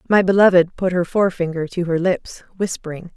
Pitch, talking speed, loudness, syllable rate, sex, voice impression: 180 Hz, 170 wpm, -18 LUFS, 5.7 syllables/s, female, feminine, adult-like, slightly soft, slightly sincere, calm, friendly, kind